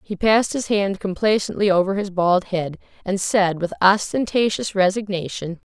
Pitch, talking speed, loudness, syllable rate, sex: 195 Hz, 145 wpm, -20 LUFS, 4.8 syllables/s, female